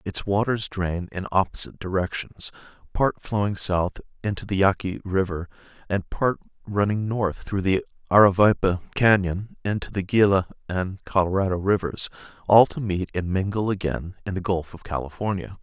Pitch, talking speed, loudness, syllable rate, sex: 95 Hz, 145 wpm, -24 LUFS, 4.9 syllables/s, male